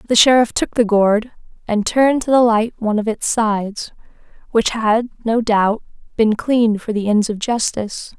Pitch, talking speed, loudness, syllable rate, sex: 225 Hz, 185 wpm, -17 LUFS, 4.8 syllables/s, female